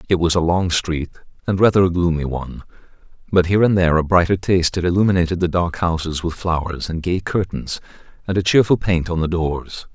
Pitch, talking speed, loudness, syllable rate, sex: 90 Hz, 205 wpm, -18 LUFS, 6.0 syllables/s, male